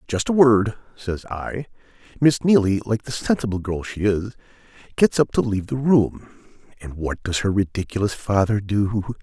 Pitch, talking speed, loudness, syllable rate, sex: 105 Hz, 170 wpm, -21 LUFS, 4.8 syllables/s, male